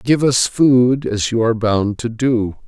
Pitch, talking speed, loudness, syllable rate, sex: 120 Hz, 200 wpm, -16 LUFS, 4.0 syllables/s, male